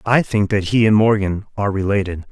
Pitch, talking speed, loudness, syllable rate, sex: 100 Hz, 205 wpm, -17 LUFS, 5.8 syllables/s, male